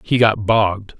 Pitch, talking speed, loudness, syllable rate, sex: 105 Hz, 180 wpm, -16 LUFS, 4.5 syllables/s, male